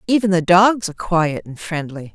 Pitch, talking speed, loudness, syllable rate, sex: 175 Hz, 195 wpm, -17 LUFS, 5.0 syllables/s, female